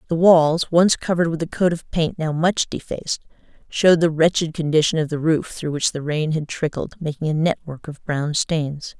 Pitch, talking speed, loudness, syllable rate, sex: 160 Hz, 205 wpm, -20 LUFS, 5.1 syllables/s, female